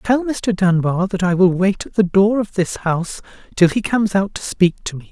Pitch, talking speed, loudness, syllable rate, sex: 190 Hz, 245 wpm, -17 LUFS, 5.2 syllables/s, male